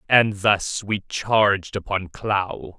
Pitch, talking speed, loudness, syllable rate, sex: 100 Hz, 130 wpm, -22 LUFS, 3.1 syllables/s, male